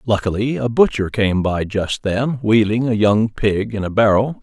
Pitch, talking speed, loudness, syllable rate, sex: 110 Hz, 190 wpm, -17 LUFS, 4.4 syllables/s, male